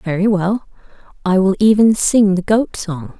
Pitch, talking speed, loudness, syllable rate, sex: 195 Hz, 170 wpm, -15 LUFS, 4.5 syllables/s, female